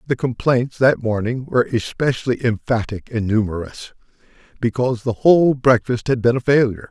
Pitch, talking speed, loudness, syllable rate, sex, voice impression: 120 Hz, 150 wpm, -18 LUFS, 5.5 syllables/s, male, very masculine, very adult-like, thick, cool, sincere, calm, slightly mature, slightly elegant